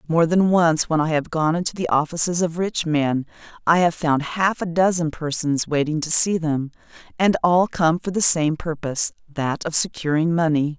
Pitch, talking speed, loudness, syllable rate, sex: 160 Hz, 195 wpm, -20 LUFS, 4.9 syllables/s, female